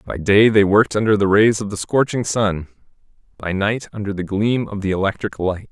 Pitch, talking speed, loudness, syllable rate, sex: 105 Hz, 210 wpm, -18 LUFS, 5.3 syllables/s, male